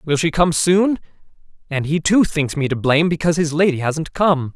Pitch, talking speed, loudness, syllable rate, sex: 160 Hz, 210 wpm, -18 LUFS, 5.3 syllables/s, male